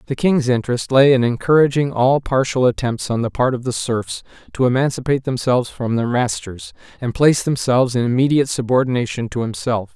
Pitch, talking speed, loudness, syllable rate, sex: 125 Hz, 175 wpm, -18 LUFS, 5.9 syllables/s, male